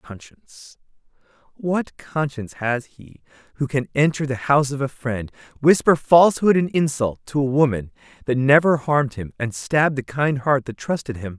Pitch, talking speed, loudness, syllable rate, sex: 135 Hz, 170 wpm, -20 LUFS, 4.9 syllables/s, male